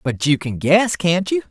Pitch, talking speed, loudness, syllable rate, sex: 150 Hz, 240 wpm, -18 LUFS, 4.4 syllables/s, male